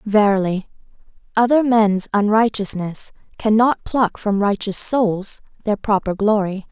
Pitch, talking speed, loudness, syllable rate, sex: 210 Hz, 105 wpm, -18 LUFS, 4.1 syllables/s, female